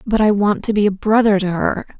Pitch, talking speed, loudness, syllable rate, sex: 205 Hz, 270 wpm, -16 LUFS, 5.7 syllables/s, female